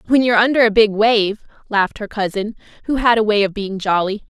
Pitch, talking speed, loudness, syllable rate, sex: 215 Hz, 235 wpm, -17 LUFS, 6.3 syllables/s, female